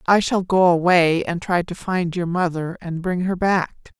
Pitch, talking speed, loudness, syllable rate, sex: 175 Hz, 210 wpm, -20 LUFS, 4.2 syllables/s, female